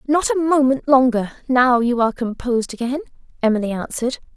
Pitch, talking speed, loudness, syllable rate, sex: 255 Hz, 150 wpm, -19 LUFS, 5.8 syllables/s, female